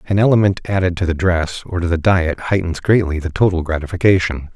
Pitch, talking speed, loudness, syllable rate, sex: 90 Hz, 200 wpm, -17 LUFS, 5.9 syllables/s, male